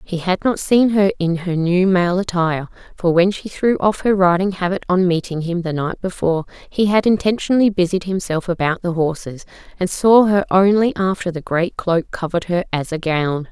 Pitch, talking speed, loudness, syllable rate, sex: 180 Hz, 200 wpm, -18 LUFS, 5.2 syllables/s, female